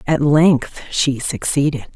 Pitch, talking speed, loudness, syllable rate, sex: 145 Hz, 125 wpm, -17 LUFS, 3.5 syllables/s, female